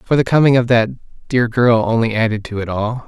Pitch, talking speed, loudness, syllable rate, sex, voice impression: 115 Hz, 235 wpm, -16 LUFS, 5.0 syllables/s, male, masculine, adult-like, slightly dark, sincere, calm, slightly sweet